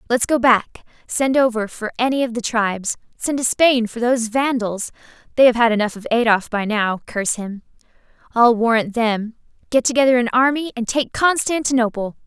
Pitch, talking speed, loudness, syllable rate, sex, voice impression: 235 Hz, 165 wpm, -18 LUFS, 5.3 syllables/s, female, feminine, slightly adult-like, clear, slightly cute, refreshing, friendly